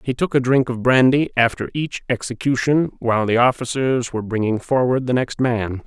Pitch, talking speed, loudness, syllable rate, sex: 125 Hz, 185 wpm, -19 LUFS, 5.2 syllables/s, male